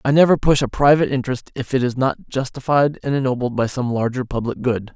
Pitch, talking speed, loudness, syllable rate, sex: 130 Hz, 220 wpm, -19 LUFS, 6.0 syllables/s, male